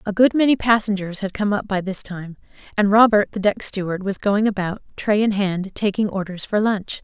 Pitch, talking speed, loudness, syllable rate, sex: 200 Hz, 215 wpm, -20 LUFS, 5.2 syllables/s, female